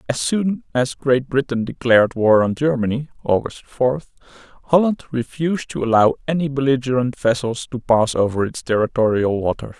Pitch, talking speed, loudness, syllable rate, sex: 125 Hz, 145 wpm, -19 LUFS, 5.2 syllables/s, male